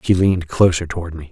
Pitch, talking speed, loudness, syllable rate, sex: 85 Hz, 225 wpm, -18 LUFS, 6.6 syllables/s, male